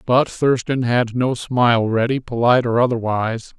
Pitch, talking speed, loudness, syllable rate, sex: 120 Hz, 150 wpm, -18 LUFS, 5.0 syllables/s, male